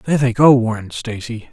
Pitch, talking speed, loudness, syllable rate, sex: 120 Hz, 195 wpm, -16 LUFS, 5.4 syllables/s, male